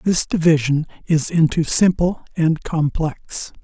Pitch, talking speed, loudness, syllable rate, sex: 160 Hz, 115 wpm, -19 LUFS, 3.8 syllables/s, male